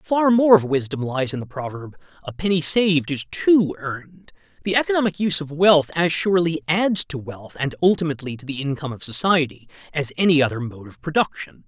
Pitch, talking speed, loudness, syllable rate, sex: 160 Hz, 190 wpm, -20 LUFS, 4.7 syllables/s, male